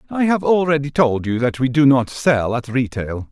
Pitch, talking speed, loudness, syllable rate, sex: 135 Hz, 215 wpm, -18 LUFS, 4.8 syllables/s, male